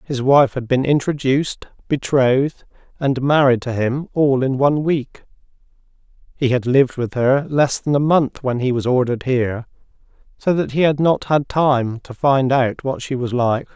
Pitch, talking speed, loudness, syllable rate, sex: 135 Hz, 185 wpm, -18 LUFS, 4.8 syllables/s, male